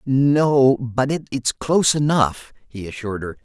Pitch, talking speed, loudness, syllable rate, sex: 130 Hz, 140 wpm, -19 LUFS, 3.8 syllables/s, male